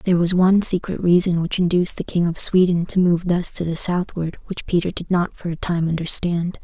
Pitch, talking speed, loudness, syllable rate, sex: 175 Hz, 225 wpm, -20 LUFS, 5.5 syllables/s, female